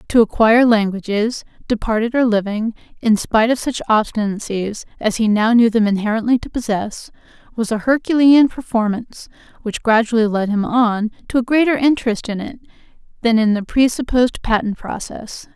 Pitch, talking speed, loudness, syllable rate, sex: 225 Hz, 155 wpm, -17 LUFS, 5.3 syllables/s, female